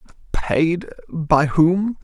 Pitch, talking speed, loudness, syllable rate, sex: 165 Hz, 90 wpm, -19 LUFS, 2.6 syllables/s, male